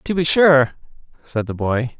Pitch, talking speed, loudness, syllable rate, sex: 135 Hz, 180 wpm, -17 LUFS, 4.3 syllables/s, male